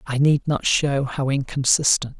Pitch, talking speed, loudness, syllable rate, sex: 135 Hz, 165 wpm, -20 LUFS, 4.4 syllables/s, male